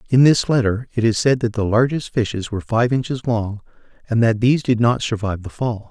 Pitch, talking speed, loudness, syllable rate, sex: 115 Hz, 225 wpm, -19 LUFS, 5.9 syllables/s, male